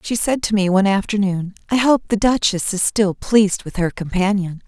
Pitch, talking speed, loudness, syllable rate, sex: 200 Hz, 205 wpm, -18 LUFS, 5.3 syllables/s, female